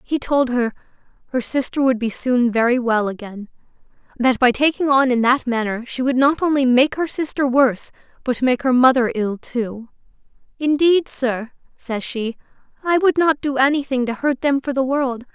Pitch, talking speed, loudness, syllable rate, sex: 255 Hz, 185 wpm, -19 LUFS, 4.8 syllables/s, female